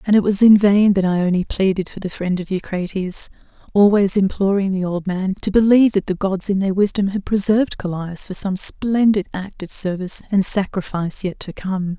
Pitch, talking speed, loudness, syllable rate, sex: 195 Hz, 200 wpm, -18 LUFS, 5.2 syllables/s, female